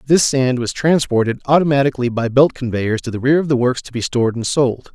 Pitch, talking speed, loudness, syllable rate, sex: 130 Hz, 230 wpm, -17 LUFS, 5.9 syllables/s, male